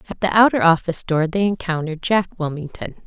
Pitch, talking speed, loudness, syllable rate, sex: 175 Hz, 175 wpm, -19 LUFS, 6.2 syllables/s, female